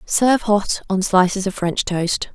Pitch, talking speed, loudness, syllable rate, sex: 195 Hz, 180 wpm, -18 LUFS, 4.2 syllables/s, female